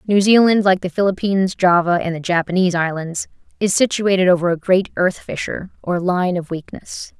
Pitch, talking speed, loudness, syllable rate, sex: 185 Hz, 175 wpm, -17 LUFS, 5.5 syllables/s, female